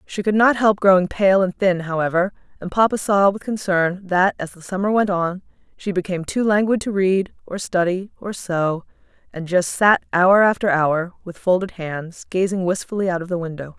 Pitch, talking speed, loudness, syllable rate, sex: 185 Hz, 195 wpm, -19 LUFS, 5.0 syllables/s, female